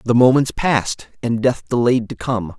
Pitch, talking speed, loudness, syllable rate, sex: 120 Hz, 185 wpm, -18 LUFS, 4.8 syllables/s, male